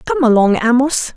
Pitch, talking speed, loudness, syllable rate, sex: 245 Hz, 155 wpm, -13 LUFS, 5.1 syllables/s, female